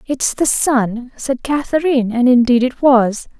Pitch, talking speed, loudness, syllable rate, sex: 255 Hz, 160 wpm, -15 LUFS, 4.1 syllables/s, female